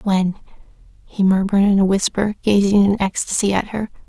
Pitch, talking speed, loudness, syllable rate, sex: 200 Hz, 160 wpm, -18 LUFS, 5.6 syllables/s, female